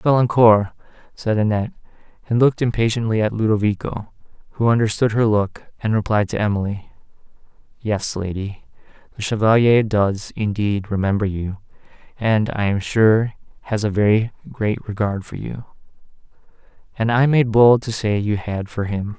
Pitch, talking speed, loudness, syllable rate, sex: 110 Hz, 140 wpm, -19 LUFS, 5.0 syllables/s, male